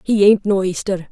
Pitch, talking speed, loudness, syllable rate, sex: 195 Hz, 215 wpm, -16 LUFS, 5.0 syllables/s, female